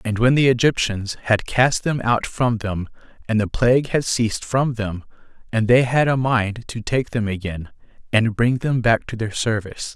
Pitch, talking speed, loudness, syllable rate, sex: 115 Hz, 200 wpm, -20 LUFS, 4.7 syllables/s, male